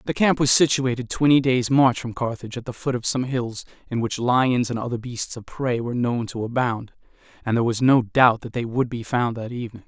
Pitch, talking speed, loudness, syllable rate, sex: 120 Hz, 235 wpm, -22 LUFS, 5.6 syllables/s, male